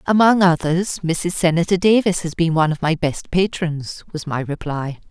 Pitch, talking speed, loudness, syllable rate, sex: 170 Hz, 175 wpm, -19 LUFS, 4.8 syllables/s, female